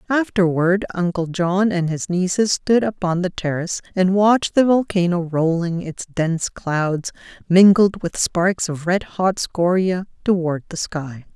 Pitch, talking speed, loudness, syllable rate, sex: 180 Hz, 150 wpm, -19 LUFS, 4.2 syllables/s, female